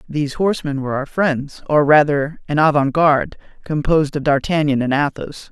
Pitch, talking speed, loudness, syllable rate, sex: 145 Hz, 165 wpm, -17 LUFS, 5.5 syllables/s, male